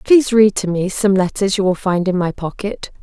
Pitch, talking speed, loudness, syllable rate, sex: 195 Hz, 240 wpm, -16 LUFS, 5.3 syllables/s, female